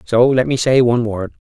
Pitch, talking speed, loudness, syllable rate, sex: 120 Hz, 250 wpm, -15 LUFS, 5.5 syllables/s, male